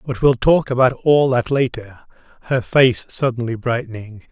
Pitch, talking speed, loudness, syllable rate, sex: 125 Hz, 155 wpm, -17 LUFS, 4.8 syllables/s, male